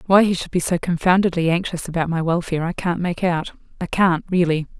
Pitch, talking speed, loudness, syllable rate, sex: 175 Hz, 200 wpm, -20 LUFS, 6.0 syllables/s, female